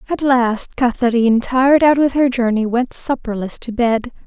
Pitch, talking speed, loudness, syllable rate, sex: 245 Hz, 170 wpm, -16 LUFS, 4.8 syllables/s, female